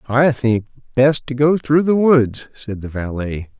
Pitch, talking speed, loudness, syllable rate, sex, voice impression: 130 Hz, 185 wpm, -17 LUFS, 4.0 syllables/s, male, masculine, middle-aged, slightly thick, weak, soft, slightly fluent, calm, slightly mature, friendly, reassuring, slightly wild, lively, kind